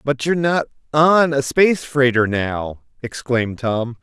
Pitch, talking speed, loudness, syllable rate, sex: 135 Hz, 150 wpm, -18 LUFS, 4.3 syllables/s, male